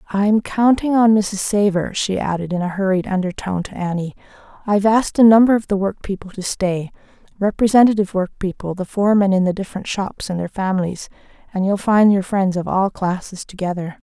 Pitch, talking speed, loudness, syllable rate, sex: 195 Hz, 170 wpm, -18 LUFS, 5.7 syllables/s, female